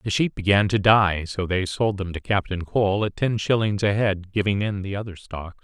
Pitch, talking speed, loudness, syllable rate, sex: 100 Hz, 235 wpm, -22 LUFS, 4.9 syllables/s, male